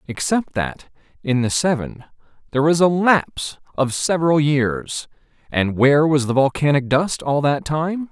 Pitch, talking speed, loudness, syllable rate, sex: 145 Hz, 150 wpm, -19 LUFS, 4.6 syllables/s, male